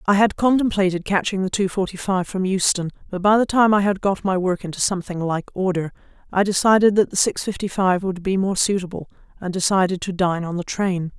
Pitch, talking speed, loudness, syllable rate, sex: 190 Hz, 220 wpm, -20 LUFS, 5.7 syllables/s, female